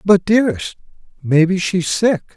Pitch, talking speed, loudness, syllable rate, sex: 180 Hz, 125 wpm, -16 LUFS, 4.7 syllables/s, male